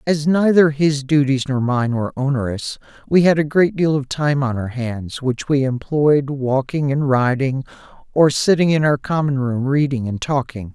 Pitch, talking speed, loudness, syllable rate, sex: 140 Hz, 185 wpm, -18 LUFS, 4.6 syllables/s, male